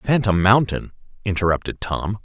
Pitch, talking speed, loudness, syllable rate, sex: 100 Hz, 105 wpm, -20 LUFS, 4.9 syllables/s, male